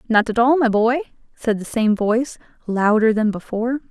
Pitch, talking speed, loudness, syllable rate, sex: 230 Hz, 185 wpm, -19 LUFS, 5.3 syllables/s, female